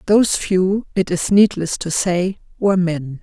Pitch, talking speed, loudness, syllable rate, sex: 185 Hz, 165 wpm, -18 LUFS, 4.3 syllables/s, female